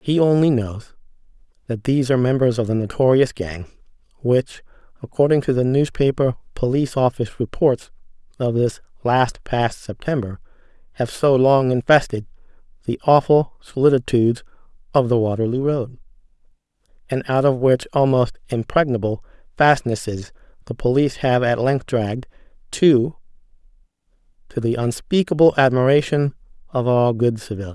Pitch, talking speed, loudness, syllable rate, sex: 125 Hz, 125 wpm, -19 LUFS, 5.1 syllables/s, male